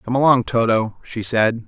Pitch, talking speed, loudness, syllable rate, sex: 115 Hz, 180 wpm, -18 LUFS, 4.6 syllables/s, male